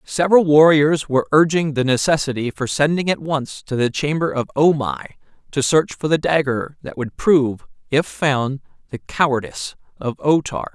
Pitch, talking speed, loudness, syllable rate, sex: 145 Hz, 175 wpm, -18 LUFS, 5.0 syllables/s, male